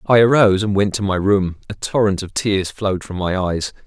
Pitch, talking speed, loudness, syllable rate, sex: 100 Hz, 235 wpm, -18 LUFS, 5.4 syllables/s, male